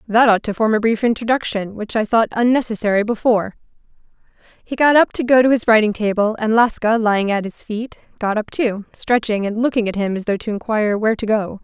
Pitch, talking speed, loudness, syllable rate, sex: 220 Hz, 215 wpm, -17 LUFS, 5.9 syllables/s, female